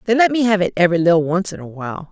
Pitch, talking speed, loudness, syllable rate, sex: 185 Hz, 315 wpm, -16 LUFS, 7.7 syllables/s, female